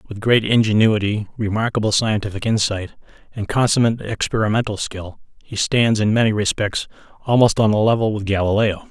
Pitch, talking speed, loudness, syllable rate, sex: 110 Hz, 140 wpm, -18 LUFS, 5.6 syllables/s, male